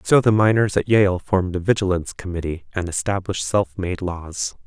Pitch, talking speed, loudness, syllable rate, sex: 95 Hz, 180 wpm, -21 LUFS, 5.4 syllables/s, male